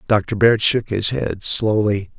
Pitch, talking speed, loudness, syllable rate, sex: 105 Hz, 165 wpm, -18 LUFS, 3.5 syllables/s, male